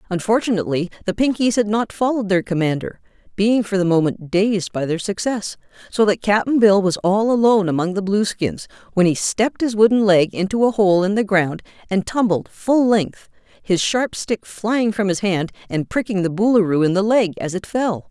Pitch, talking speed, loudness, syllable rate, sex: 200 Hz, 195 wpm, -18 LUFS, 5.1 syllables/s, female